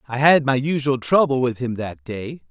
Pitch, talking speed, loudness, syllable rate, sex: 125 Hz, 215 wpm, -20 LUFS, 4.8 syllables/s, male